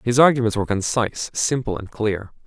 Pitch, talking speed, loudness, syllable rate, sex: 110 Hz, 170 wpm, -21 LUFS, 5.8 syllables/s, male